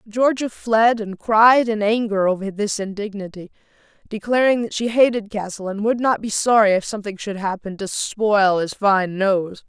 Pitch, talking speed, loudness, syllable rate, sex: 210 Hz, 175 wpm, -19 LUFS, 4.7 syllables/s, female